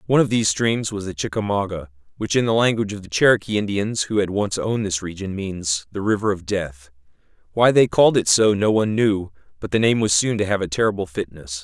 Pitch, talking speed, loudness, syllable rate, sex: 100 Hz, 225 wpm, -20 LUFS, 6.1 syllables/s, male